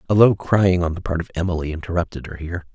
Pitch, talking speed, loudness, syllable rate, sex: 85 Hz, 240 wpm, -21 LUFS, 6.9 syllables/s, male